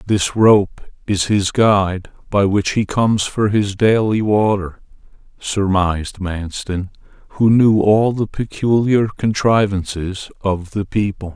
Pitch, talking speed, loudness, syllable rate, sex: 100 Hz, 125 wpm, -17 LUFS, 3.9 syllables/s, male